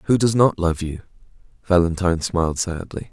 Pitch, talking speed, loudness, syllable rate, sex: 90 Hz, 155 wpm, -20 LUFS, 5.6 syllables/s, male